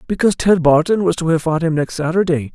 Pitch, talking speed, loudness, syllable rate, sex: 165 Hz, 235 wpm, -16 LUFS, 6.3 syllables/s, male